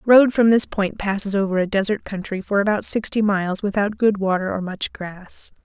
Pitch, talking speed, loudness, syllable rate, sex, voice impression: 200 Hz, 200 wpm, -20 LUFS, 5.2 syllables/s, female, very feminine, very adult-like, thin, slightly tensed, slightly weak, bright, soft, clear, very fluent, slightly raspy, cute, intellectual, very refreshing, sincere, calm, friendly, reassuring, unique, slightly elegant, very sweet, lively, kind, slightly modest, light